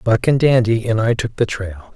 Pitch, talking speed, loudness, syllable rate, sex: 110 Hz, 245 wpm, -17 LUFS, 5.1 syllables/s, male